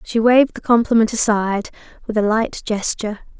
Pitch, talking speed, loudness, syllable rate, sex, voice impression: 220 Hz, 160 wpm, -17 LUFS, 5.8 syllables/s, female, gender-neutral, young, bright, soft, halting, friendly, unique, slightly sweet, kind, slightly modest